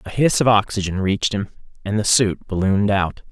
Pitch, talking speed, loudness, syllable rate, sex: 100 Hz, 200 wpm, -19 LUFS, 5.9 syllables/s, male